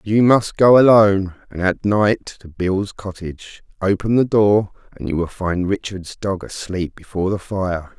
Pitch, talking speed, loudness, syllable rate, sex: 100 Hz, 175 wpm, -18 LUFS, 4.6 syllables/s, male